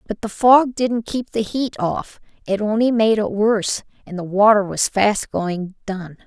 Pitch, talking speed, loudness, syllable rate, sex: 210 Hz, 190 wpm, -19 LUFS, 4.2 syllables/s, female